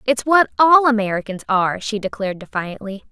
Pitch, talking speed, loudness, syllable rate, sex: 220 Hz, 155 wpm, -18 LUFS, 5.7 syllables/s, female